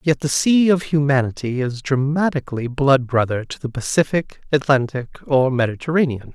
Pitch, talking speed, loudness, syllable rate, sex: 140 Hz, 140 wpm, -19 LUFS, 5.2 syllables/s, male